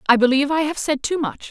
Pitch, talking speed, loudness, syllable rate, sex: 280 Hz, 280 wpm, -19 LUFS, 6.8 syllables/s, female